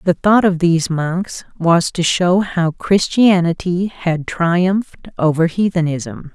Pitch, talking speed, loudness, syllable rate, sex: 175 Hz, 130 wpm, -16 LUFS, 3.7 syllables/s, female